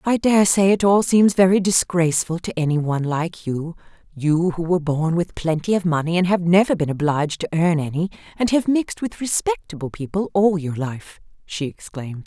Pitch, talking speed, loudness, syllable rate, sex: 175 Hz, 190 wpm, -20 LUFS, 5.4 syllables/s, female